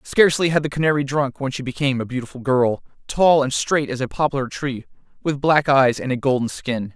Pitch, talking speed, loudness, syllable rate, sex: 135 Hz, 215 wpm, -20 LUFS, 5.6 syllables/s, male